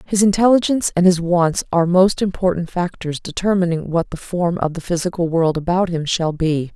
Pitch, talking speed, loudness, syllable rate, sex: 175 Hz, 185 wpm, -18 LUFS, 5.4 syllables/s, female